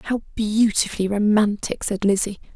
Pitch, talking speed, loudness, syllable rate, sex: 210 Hz, 115 wpm, -21 LUFS, 4.9 syllables/s, female